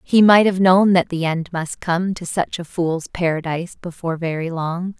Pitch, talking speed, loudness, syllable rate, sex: 175 Hz, 205 wpm, -19 LUFS, 4.7 syllables/s, female